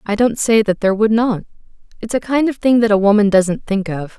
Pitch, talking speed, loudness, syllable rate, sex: 215 Hz, 260 wpm, -15 LUFS, 5.7 syllables/s, female